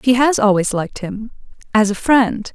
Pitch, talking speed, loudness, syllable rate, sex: 225 Hz, 165 wpm, -16 LUFS, 4.9 syllables/s, female